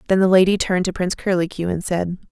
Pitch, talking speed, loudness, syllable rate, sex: 180 Hz, 235 wpm, -19 LUFS, 7.0 syllables/s, female